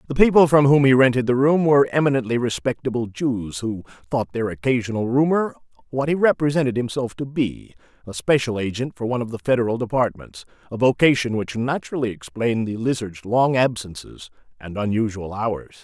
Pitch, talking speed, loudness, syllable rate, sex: 120 Hz, 165 wpm, -21 LUFS, 5.7 syllables/s, male